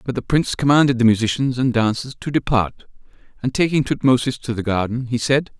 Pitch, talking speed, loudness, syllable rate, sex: 125 Hz, 195 wpm, -19 LUFS, 6.0 syllables/s, male